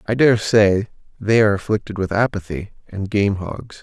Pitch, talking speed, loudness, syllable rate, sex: 105 Hz, 175 wpm, -19 LUFS, 4.9 syllables/s, male